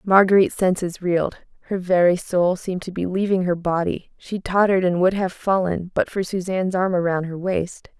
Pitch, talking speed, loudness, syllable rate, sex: 185 Hz, 190 wpm, -21 LUFS, 5.2 syllables/s, female